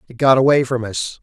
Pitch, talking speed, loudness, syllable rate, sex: 125 Hz, 245 wpm, -16 LUFS, 5.8 syllables/s, male